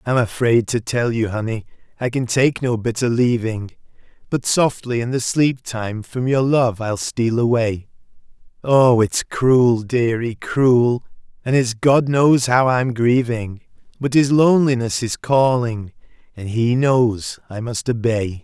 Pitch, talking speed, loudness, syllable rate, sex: 120 Hz, 155 wpm, -18 LUFS, 3.9 syllables/s, male